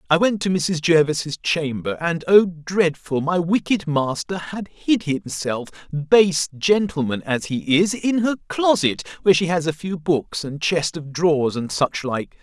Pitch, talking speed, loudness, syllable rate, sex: 165 Hz, 175 wpm, -20 LUFS, 4.0 syllables/s, male